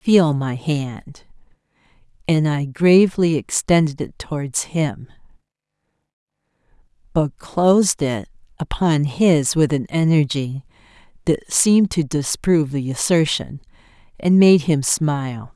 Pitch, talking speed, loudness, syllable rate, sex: 150 Hz, 105 wpm, -18 LUFS, 3.9 syllables/s, female